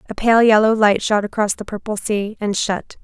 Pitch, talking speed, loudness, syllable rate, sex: 210 Hz, 215 wpm, -17 LUFS, 5.1 syllables/s, female